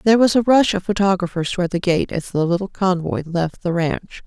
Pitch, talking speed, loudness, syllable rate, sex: 180 Hz, 225 wpm, -19 LUFS, 5.9 syllables/s, female